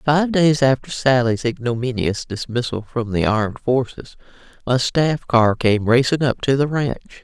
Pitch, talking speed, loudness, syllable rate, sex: 125 Hz, 160 wpm, -19 LUFS, 4.6 syllables/s, female